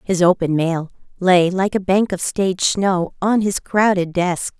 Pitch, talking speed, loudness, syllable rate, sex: 185 Hz, 185 wpm, -18 LUFS, 4.4 syllables/s, female